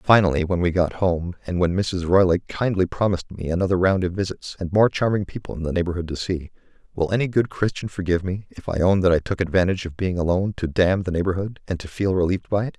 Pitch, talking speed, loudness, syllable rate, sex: 90 Hz, 240 wpm, -22 LUFS, 6.6 syllables/s, male